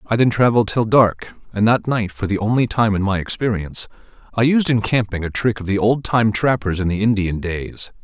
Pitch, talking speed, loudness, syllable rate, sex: 110 Hz, 225 wpm, -18 LUFS, 5.4 syllables/s, male